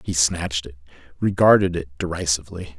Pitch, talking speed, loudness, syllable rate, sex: 80 Hz, 130 wpm, -21 LUFS, 5.8 syllables/s, male